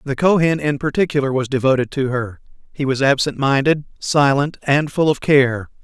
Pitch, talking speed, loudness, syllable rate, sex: 140 Hz, 175 wpm, -17 LUFS, 5.1 syllables/s, male